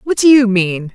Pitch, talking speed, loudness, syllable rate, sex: 220 Hz, 255 wpm, -12 LUFS, 4.4 syllables/s, female